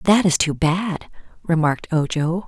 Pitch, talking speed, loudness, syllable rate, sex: 170 Hz, 145 wpm, -20 LUFS, 4.4 syllables/s, female